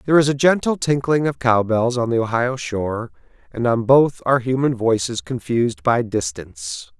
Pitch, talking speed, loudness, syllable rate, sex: 120 Hz, 170 wpm, -19 LUFS, 5.2 syllables/s, male